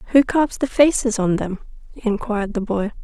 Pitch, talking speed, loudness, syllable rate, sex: 225 Hz, 180 wpm, -20 LUFS, 5.6 syllables/s, female